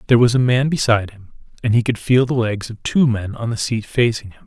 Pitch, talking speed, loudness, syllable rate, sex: 115 Hz, 270 wpm, -18 LUFS, 6.2 syllables/s, male